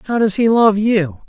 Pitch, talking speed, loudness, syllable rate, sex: 205 Hz, 235 wpm, -14 LUFS, 4.7 syllables/s, male